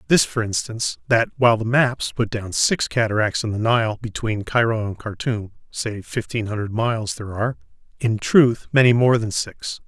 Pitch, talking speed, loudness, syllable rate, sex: 110 Hz, 180 wpm, -21 LUFS, 5.0 syllables/s, male